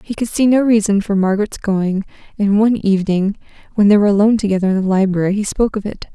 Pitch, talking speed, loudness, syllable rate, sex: 205 Hz, 225 wpm, -15 LUFS, 6.9 syllables/s, female